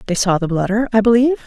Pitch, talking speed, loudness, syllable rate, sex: 215 Hz, 245 wpm, -16 LUFS, 7.6 syllables/s, female